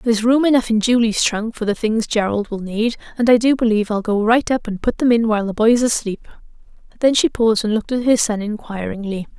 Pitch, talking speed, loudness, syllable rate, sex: 225 Hz, 235 wpm, -18 LUFS, 6.0 syllables/s, female